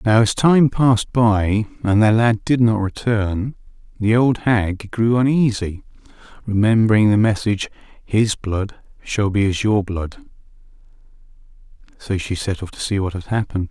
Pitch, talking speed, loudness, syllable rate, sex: 105 Hz, 155 wpm, -18 LUFS, 4.6 syllables/s, male